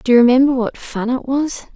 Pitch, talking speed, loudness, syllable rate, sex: 255 Hz, 240 wpm, -16 LUFS, 5.5 syllables/s, female